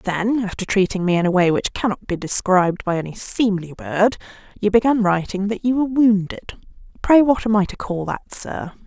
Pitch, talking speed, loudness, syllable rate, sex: 200 Hz, 205 wpm, -19 LUFS, 5.2 syllables/s, female